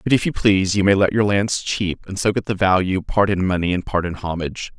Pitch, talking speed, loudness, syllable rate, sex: 95 Hz, 275 wpm, -19 LUFS, 5.7 syllables/s, male